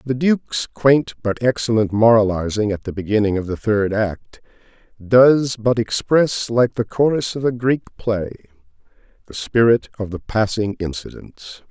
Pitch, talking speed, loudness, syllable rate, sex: 110 Hz, 150 wpm, -18 LUFS, 4.4 syllables/s, male